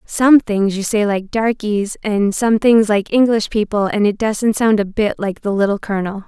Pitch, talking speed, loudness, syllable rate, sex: 210 Hz, 210 wpm, -16 LUFS, 4.6 syllables/s, female